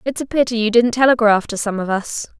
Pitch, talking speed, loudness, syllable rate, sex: 230 Hz, 250 wpm, -17 LUFS, 5.9 syllables/s, female